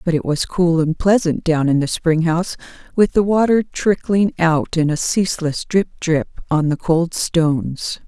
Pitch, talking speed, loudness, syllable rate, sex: 165 Hz, 185 wpm, -18 LUFS, 4.5 syllables/s, female